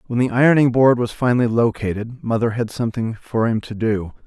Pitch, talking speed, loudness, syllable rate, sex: 115 Hz, 195 wpm, -19 LUFS, 5.8 syllables/s, male